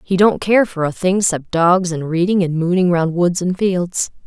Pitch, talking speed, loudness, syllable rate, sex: 180 Hz, 225 wpm, -16 LUFS, 4.5 syllables/s, female